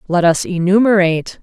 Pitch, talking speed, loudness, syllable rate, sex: 180 Hz, 125 wpm, -14 LUFS, 5.5 syllables/s, female